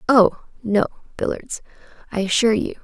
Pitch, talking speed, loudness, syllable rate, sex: 220 Hz, 125 wpm, -21 LUFS, 5.6 syllables/s, female